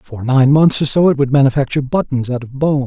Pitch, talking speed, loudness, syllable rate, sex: 135 Hz, 250 wpm, -14 LUFS, 6.0 syllables/s, male